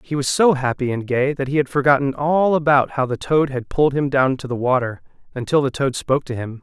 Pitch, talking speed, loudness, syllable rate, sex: 135 Hz, 255 wpm, -19 LUFS, 5.8 syllables/s, male